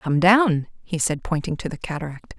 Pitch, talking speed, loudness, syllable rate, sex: 170 Hz, 200 wpm, -22 LUFS, 5.2 syllables/s, female